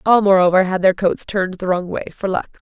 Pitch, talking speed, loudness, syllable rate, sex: 190 Hz, 245 wpm, -17 LUFS, 5.7 syllables/s, female